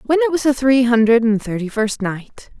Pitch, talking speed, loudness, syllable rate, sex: 245 Hz, 230 wpm, -16 LUFS, 5.2 syllables/s, female